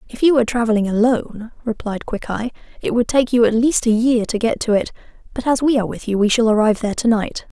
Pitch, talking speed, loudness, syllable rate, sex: 230 Hz, 245 wpm, -18 LUFS, 6.4 syllables/s, female